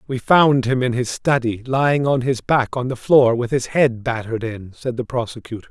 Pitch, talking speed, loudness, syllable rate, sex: 125 Hz, 220 wpm, -19 LUFS, 5.1 syllables/s, male